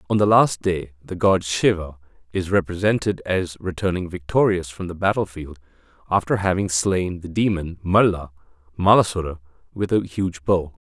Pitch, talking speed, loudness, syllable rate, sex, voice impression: 90 Hz, 145 wpm, -21 LUFS, 4.8 syllables/s, male, masculine, adult-like, tensed, powerful, clear, fluent, cool, intellectual, mature, wild, lively, kind